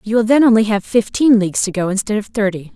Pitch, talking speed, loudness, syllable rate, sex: 215 Hz, 260 wpm, -15 LUFS, 6.4 syllables/s, female